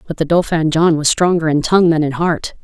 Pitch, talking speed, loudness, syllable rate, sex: 160 Hz, 250 wpm, -14 LUFS, 5.8 syllables/s, female